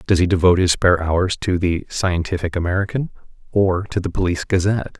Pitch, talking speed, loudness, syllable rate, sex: 90 Hz, 180 wpm, -19 LUFS, 6.2 syllables/s, male